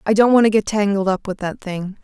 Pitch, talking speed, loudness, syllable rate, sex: 200 Hz, 295 wpm, -18 LUFS, 5.8 syllables/s, female